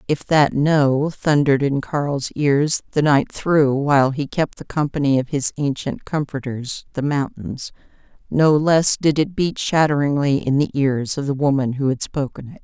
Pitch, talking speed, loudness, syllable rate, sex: 140 Hz, 175 wpm, -19 LUFS, 4.4 syllables/s, female